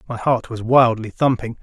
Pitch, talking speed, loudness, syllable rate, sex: 120 Hz, 185 wpm, -18 LUFS, 4.9 syllables/s, male